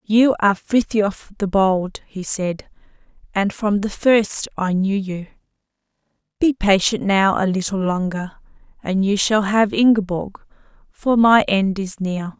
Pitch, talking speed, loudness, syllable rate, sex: 200 Hz, 145 wpm, -19 LUFS, 4.0 syllables/s, female